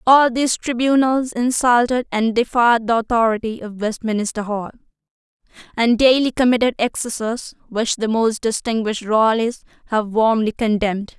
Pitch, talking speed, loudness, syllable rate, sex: 230 Hz, 125 wpm, -18 LUFS, 4.9 syllables/s, female